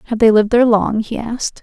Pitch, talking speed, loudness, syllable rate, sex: 225 Hz, 260 wpm, -15 LUFS, 7.1 syllables/s, female